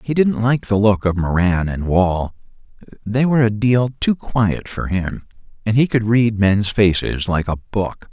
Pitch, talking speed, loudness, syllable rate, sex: 105 Hz, 185 wpm, -18 LUFS, 4.2 syllables/s, male